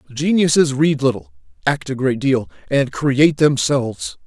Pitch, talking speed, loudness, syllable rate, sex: 130 Hz, 140 wpm, -17 LUFS, 4.7 syllables/s, male